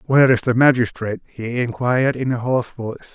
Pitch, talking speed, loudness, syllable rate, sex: 120 Hz, 190 wpm, -19 LUFS, 6.2 syllables/s, male